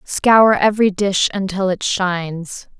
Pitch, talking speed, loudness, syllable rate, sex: 195 Hz, 130 wpm, -16 LUFS, 3.9 syllables/s, female